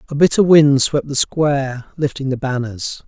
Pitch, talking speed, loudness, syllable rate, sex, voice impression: 140 Hz, 175 wpm, -16 LUFS, 4.7 syllables/s, male, masculine, adult-like, slightly fluent, refreshing, slightly unique